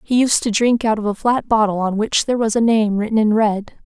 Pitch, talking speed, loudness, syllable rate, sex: 220 Hz, 280 wpm, -17 LUFS, 5.7 syllables/s, female